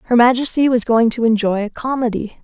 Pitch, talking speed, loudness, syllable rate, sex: 235 Hz, 195 wpm, -16 LUFS, 5.8 syllables/s, female